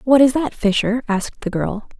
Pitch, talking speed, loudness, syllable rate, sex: 230 Hz, 210 wpm, -19 LUFS, 5.2 syllables/s, female